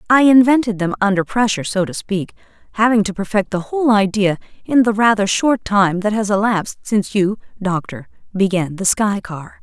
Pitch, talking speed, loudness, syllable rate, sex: 205 Hz, 180 wpm, -17 LUFS, 5.4 syllables/s, female